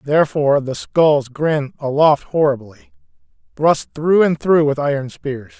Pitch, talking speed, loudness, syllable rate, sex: 145 Hz, 140 wpm, -17 LUFS, 4.2 syllables/s, male